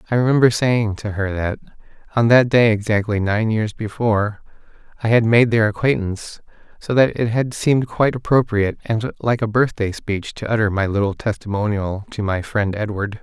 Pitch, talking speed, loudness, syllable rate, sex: 110 Hz, 175 wpm, -19 LUFS, 5.3 syllables/s, male